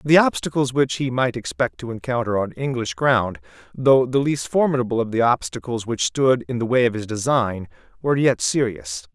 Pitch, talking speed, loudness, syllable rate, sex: 120 Hz, 190 wpm, -21 LUFS, 5.2 syllables/s, male